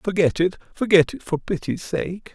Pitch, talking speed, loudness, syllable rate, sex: 175 Hz, 180 wpm, -22 LUFS, 4.8 syllables/s, male